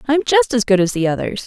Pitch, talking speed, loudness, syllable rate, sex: 200 Hz, 330 wpm, -16 LUFS, 7.1 syllables/s, female